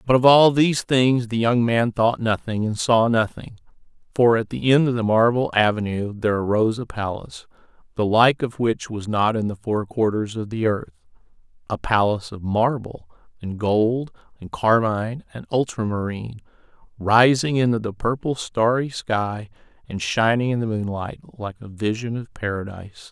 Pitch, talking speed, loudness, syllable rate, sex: 110 Hz, 160 wpm, -21 LUFS, 4.9 syllables/s, male